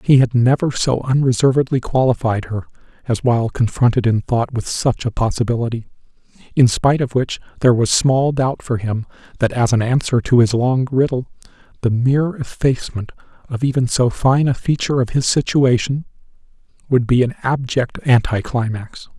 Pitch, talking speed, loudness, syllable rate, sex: 125 Hz, 160 wpm, -17 LUFS, 5.3 syllables/s, male